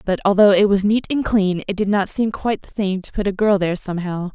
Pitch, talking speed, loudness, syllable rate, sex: 200 Hz, 275 wpm, -19 LUFS, 6.1 syllables/s, female